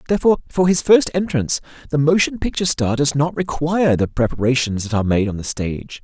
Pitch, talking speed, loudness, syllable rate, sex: 145 Hz, 200 wpm, -18 LUFS, 6.5 syllables/s, male